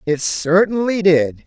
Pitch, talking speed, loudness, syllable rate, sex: 175 Hz, 125 wpm, -16 LUFS, 3.7 syllables/s, male